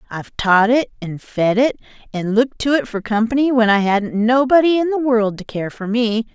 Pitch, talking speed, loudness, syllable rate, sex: 230 Hz, 220 wpm, -17 LUFS, 5.1 syllables/s, female